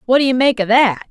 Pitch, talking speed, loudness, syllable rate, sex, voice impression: 240 Hz, 325 wpm, -14 LUFS, 6.6 syllables/s, female, feminine, adult-like, tensed, powerful, bright, clear, fluent, intellectual, friendly, elegant, lively, sharp